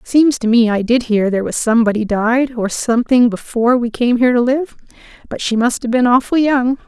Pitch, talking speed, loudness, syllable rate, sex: 240 Hz, 220 wpm, -15 LUFS, 5.7 syllables/s, female